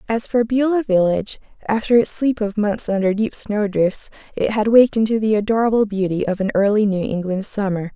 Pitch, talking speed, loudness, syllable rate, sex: 210 Hz, 195 wpm, -18 LUFS, 5.5 syllables/s, female